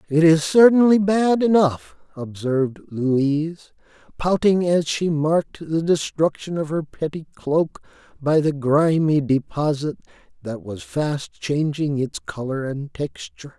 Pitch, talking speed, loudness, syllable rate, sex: 155 Hz, 130 wpm, -20 LUFS, 4.0 syllables/s, male